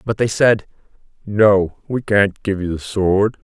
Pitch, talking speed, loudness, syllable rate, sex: 100 Hz, 170 wpm, -17 LUFS, 3.8 syllables/s, male